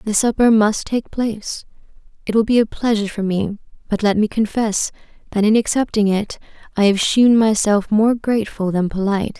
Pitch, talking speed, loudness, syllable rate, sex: 215 Hz, 180 wpm, -17 LUFS, 5.3 syllables/s, female